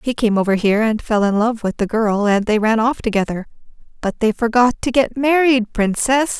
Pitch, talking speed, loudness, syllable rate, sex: 225 Hz, 215 wpm, -17 LUFS, 5.2 syllables/s, female